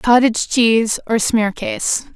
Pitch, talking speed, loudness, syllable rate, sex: 225 Hz, 110 wpm, -16 LUFS, 4.5 syllables/s, female